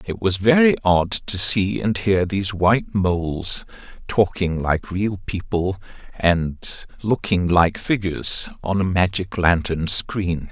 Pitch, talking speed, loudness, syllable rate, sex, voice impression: 95 Hz, 135 wpm, -20 LUFS, 3.8 syllables/s, male, very masculine, very adult-like, slightly thick, cool, sincere, calm, slightly elegant